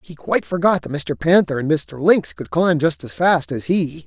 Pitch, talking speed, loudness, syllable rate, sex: 145 Hz, 235 wpm, -19 LUFS, 4.8 syllables/s, male